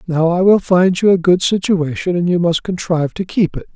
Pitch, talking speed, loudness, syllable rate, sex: 175 Hz, 240 wpm, -15 LUFS, 5.3 syllables/s, male